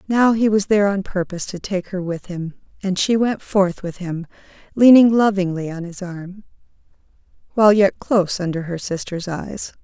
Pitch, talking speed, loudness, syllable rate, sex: 190 Hz, 175 wpm, -19 LUFS, 5.0 syllables/s, female